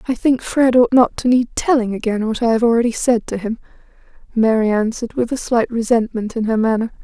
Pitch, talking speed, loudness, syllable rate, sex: 230 Hz, 215 wpm, -17 LUFS, 5.8 syllables/s, female